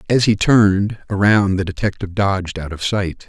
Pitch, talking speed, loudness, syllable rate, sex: 100 Hz, 185 wpm, -17 LUFS, 5.4 syllables/s, male